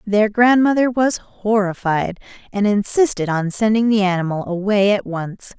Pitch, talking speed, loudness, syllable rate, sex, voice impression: 205 Hz, 140 wpm, -18 LUFS, 4.5 syllables/s, female, very feminine, adult-like, slightly middle-aged, thin, slightly tensed, slightly powerful, bright, hard, very clear, very fluent, cute, intellectual, slightly refreshing, sincere, slightly calm, friendly, slightly reassuring, very unique, slightly elegant, slightly wild, lively, kind, sharp